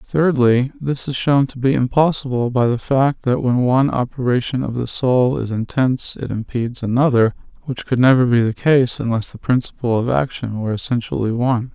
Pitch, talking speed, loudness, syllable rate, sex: 125 Hz, 185 wpm, -18 LUFS, 5.3 syllables/s, male